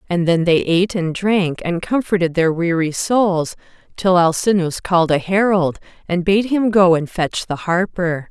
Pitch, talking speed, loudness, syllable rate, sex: 180 Hz, 175 wpm, -17 LUFS, 4.4 syllables/s, female